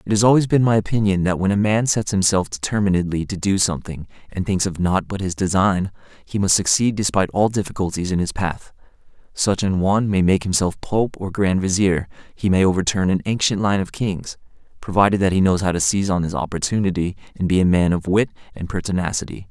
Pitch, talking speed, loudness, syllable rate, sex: 95 Hz, 205 wpm, -19 LUFS, 6.0 syllables/s, male